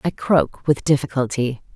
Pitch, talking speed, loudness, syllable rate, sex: 130 Hz, 135 wpm, -20 LUFS, 4.5 syllables/s, female